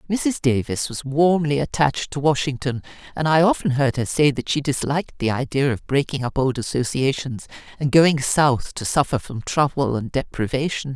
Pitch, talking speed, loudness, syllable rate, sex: 140 Hz, 175 wpm, -21 LUFS, 5.1 syllables/s, female